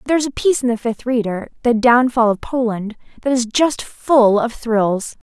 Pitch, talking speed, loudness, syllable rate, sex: 240 Hz, 180 wpm, -17 LUFS, 4.9 syllables/s, female